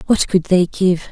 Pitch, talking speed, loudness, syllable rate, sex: 185 Hz, 215 wpm, -16 LUFS, 4.3 syllables/s, female